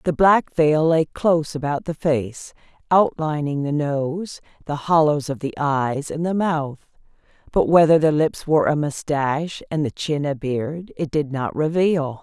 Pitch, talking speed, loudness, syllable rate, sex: 150 Hz, 170 wpm, -20 LUFS, 4.2 syllables/s, female